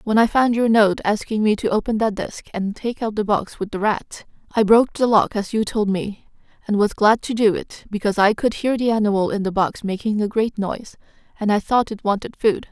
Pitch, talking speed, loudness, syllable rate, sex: 215 Hz, 245 wpm, -20 LUFS, 5.5 syllables/s, female